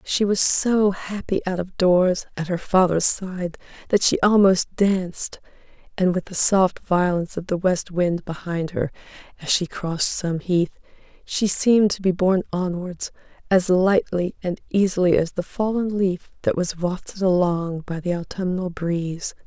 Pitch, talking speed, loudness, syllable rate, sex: 180 Hz, 165 wpm, -21 LUFS, 4.5 syllables/s, female